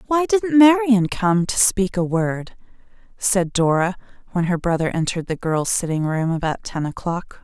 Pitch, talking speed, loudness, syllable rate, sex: 190 Hz, 170 wpm, -19 LUFS, 4.6 syllables/s, female